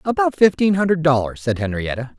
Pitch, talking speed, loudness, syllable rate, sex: 155 Hz, 165 wpm, -18 LUFS, 5.9 syllables/s, male